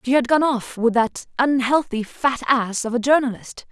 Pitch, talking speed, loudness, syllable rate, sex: 250 Hz, 180 wpm, -20 LUFS, 4.7 syllables/s, female